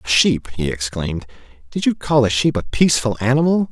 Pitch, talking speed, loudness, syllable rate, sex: 120 Hz, 195 wpm, -18 LUFS, 5.9 syllables/s, male